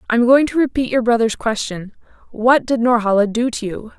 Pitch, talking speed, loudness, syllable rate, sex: 235 Hz, 180 wpm, -17 LUFS, 5.3 syllables/s, female